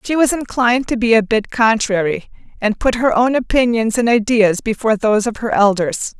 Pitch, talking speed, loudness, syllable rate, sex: 225 Hz, 195 wpm, -16 LUFS, 5.4 syllables/s, female